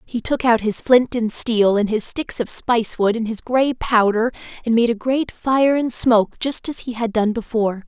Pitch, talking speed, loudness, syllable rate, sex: 230 Hz, 230 wpm, -19 LUFS, 4.8 syllables/s, female